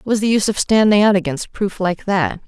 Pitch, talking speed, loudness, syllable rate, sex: 200 Hz, 265 wpm, -17 LUFS, 6.0 syllables/s, female